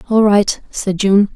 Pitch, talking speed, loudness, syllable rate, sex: 200 Hz, 175 wpm, -14 LUFS, 3.7 syllables/s, female